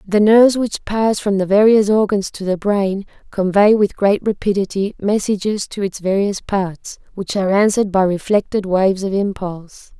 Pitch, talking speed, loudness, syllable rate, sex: 200 Hz, 170 wpm, -16 LUFS, 4.9 syllables/s, female